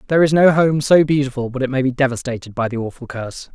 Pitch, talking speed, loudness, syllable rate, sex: 135 Hz, 255 wpm, -17 LUFS, 6.9 syllables/s, male